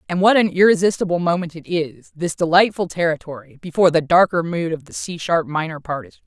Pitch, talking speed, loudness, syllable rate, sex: 170 Hz, 210 wpm, -19 LUFS, 6.2 syllables/s, female